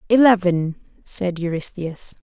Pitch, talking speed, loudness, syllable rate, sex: 185 Hz, 80 wpm, -20 LUFS, 4.1 syllables/s, female